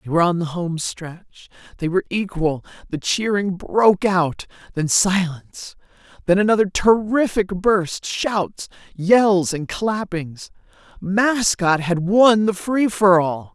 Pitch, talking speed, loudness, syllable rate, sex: 190 Hz, 130 wpm, -19 LUFS, 3.8 syllables/s, female